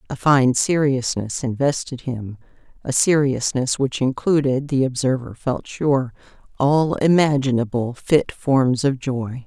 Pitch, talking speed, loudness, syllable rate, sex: 135 Hz, 115 wpm, -20 LUFS, 3.9 syllables/s, female